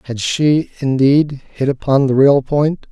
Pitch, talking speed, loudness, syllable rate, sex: 140 Hz, 165 wpm, -15 LUFS, 3.9 syllables/s, male